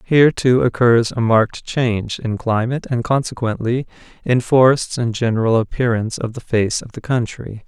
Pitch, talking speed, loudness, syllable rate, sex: 120 Hz, 165 wpm, -18 LUFS, 5.2 syllables/s, male